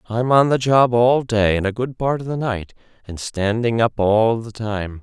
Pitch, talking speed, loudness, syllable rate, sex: 115 Hz, 225 wpm, -18 LUFS, 4.3 syllables/s, male